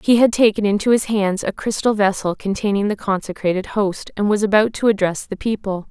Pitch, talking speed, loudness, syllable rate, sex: 205 Hz, 205 wpm, -19 LUFS, 5.6 syllables/s, female